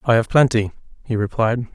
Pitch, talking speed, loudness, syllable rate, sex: 115 Hz, 170 wpm, -19 LUFS, 5.3 syllables/s, male